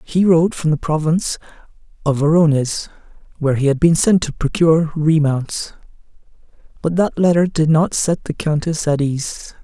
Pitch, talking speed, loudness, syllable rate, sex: 155 Hz, 155 wpm, -17 LUFS, 5.0 syllables/s, male